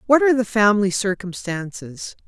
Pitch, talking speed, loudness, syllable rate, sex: 210 Hz, 130 wpm, -19 LUFS, 5.4 syllables/s, female